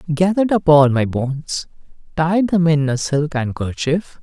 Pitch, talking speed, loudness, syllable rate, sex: 155 Hz, 155 wpm, -17 LUFS, 4.6 syllables/s, male